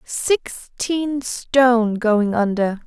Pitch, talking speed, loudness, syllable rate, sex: 240 Hz, 85 wpm, -19 LUFS, 2.6 syllables/s, female